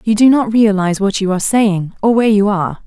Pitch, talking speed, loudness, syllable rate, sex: 205 Hz, 250 wpm, -13 LUFS, 6.3 syllables/s, female